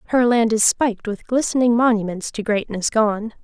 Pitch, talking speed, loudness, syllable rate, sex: 225 Hz, 175 wpm, -19 LUFS, 5.2 syllables/s, female